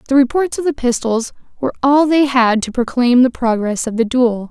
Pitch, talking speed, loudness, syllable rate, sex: 250 Hz, 215 wpm, -15 LUFS, 5.3 syllables/s, female